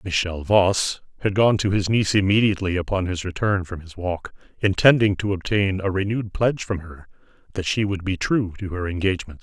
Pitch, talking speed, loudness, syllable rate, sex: 95 Hz, 190 wpm, -22 LUFS, 5.7 syllables/s, male